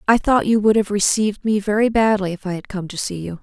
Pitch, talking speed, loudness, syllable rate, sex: 205 Hz, 280 wpm, -19 LUFS, 6.1 syllables/s, female